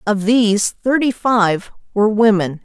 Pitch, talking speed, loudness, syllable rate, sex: 210 Hz, 135 wpm, -16 LUFS, 4.4 syllables/s, female